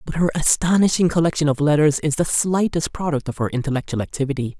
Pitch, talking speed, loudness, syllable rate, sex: 155 Hz, 185 wpm, -20 LUFS, 6.3 syllables/s, female